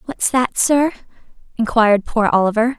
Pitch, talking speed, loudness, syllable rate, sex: 235 Hz, 130 wpm, -16 LUFS, 5.0 syllables/s, female